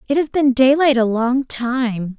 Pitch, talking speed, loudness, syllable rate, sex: 255 Hz, 195 wpm, -17 LUFS, 4.0 syllables/s, female